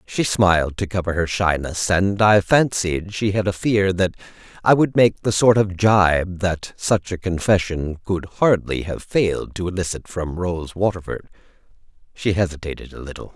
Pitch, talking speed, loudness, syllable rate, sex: 95 Hz, 170 wpm, -20 LUFS, 4.6 syllables/s, male